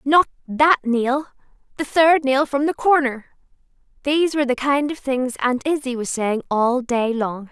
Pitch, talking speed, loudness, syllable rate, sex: 270 Hz, 170 wpm, -20 LUFS, 4.4 syllables/s, female